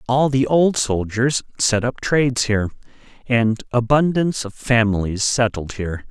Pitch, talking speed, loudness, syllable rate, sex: 120 Hz, 140 wpm, -19 LUFS, 4.7 syllables/s, male